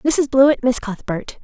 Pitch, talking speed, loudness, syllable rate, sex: 255 Hz, 170 wpm, -17 LUFS, 4.4 syllables/s, female